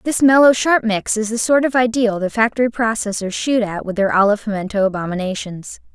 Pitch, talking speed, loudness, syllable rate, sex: 220 Hz, 190 wpm, -17 LUFS, 5.8 syllables/s, female